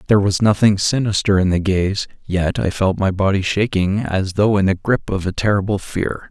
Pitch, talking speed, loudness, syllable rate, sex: 100 Hz, 210 wpm, -18 LUFS, 5.0 syllables/s, male